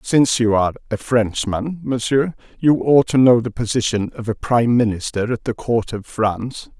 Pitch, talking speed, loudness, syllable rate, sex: 115 Hz, 185 wpm, -18 LUFS, 5.0 syllables/s, male